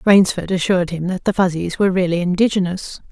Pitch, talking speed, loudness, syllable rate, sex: 180 Hz, 175 wpm, -18 LUFS, 6.2 syllables/s, female